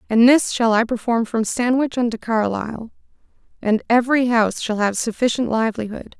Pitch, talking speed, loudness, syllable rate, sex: 230 Hz, 155 wpm, -19 LUFS, 5.5 syllables/s, female